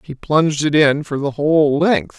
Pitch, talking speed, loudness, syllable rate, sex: 145 Hz, 220 wpm, -16 LUFS, 4.8 syllables/s, male